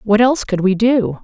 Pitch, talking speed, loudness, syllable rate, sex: 220 Hz, 240 wpm, -15 LUFS, 5.4 syllables/s, female